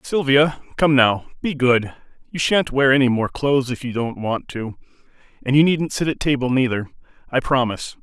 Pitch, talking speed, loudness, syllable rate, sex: 130 Hz, 185 wpm, -19 LUFS, 5.1 syllables/s, male